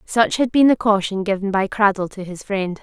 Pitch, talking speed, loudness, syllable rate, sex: 205 Hz, 235 wpm, -19 LUFS, 5.1 syllables/s, female